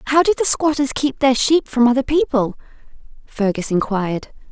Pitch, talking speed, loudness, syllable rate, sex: 260 Hz, 160 wpm, -18 LUFS, 5.3 syllables/s, female